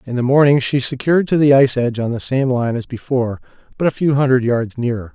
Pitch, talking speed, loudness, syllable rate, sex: 130 Hz, 245 wpm, -16 LUFS, 6.4 syllables/s, male